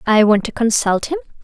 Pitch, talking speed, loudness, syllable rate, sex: 235 Hz, 210 wpm, -16 LUFS, 5.6 syllables/s, female